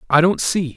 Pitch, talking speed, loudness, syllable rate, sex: 165 Hz, 235 wpm, -17 LUFS, 5.5 syllables/s, male